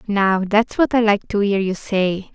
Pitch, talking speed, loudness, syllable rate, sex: 205 Hz, 230 wpm, -18 LUFS, 4.2 syllables/s, female